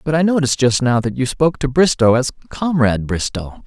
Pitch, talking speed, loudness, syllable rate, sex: 135 Hz, 215 wpm, -16 LUFS, 5.9 syllables/s, male